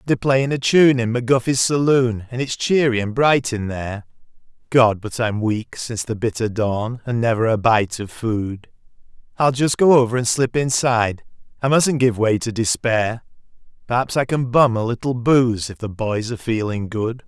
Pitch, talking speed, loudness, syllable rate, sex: 120 Hz, 180 wpm, -19 LUFS, 4.1 syllables/s, male